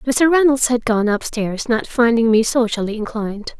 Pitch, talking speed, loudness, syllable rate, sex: 235 Hz, 185 wpm, -17 LUFS, 4.8 syllables/s, female